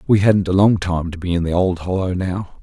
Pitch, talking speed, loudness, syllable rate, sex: 95 Hz, 275 wpm, -18 LUFS, 5.4 syllables/s, male